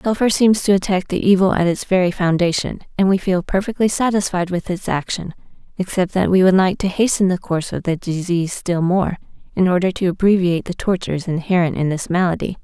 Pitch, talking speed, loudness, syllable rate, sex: 185 Hz, 200 wpm, -18 LUFS, 5.9 syllables/s, female